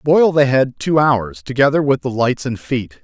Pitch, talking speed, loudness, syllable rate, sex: 130 Hz, 215 wpm, -16 LUFS, 4.6 syllables/s, male